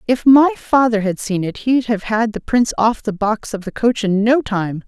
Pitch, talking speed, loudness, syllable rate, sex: 225 Hz, 245 wpm, -17 LUFS, 4.8 syllables/s, female